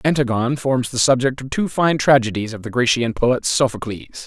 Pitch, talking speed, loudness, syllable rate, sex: 125 Hz, 185 wpm, -18 LUFS, 5.3 syllables/s, male